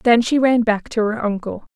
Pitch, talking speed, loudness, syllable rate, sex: 225 Hz, 240 wpm, -18 LUFS, 5.0 syllables/s, female